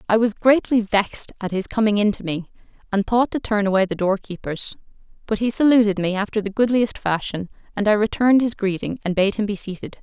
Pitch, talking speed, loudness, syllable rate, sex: 210 Hz, 210 wpm, -21 LUFS, 5.9 syllables/s, female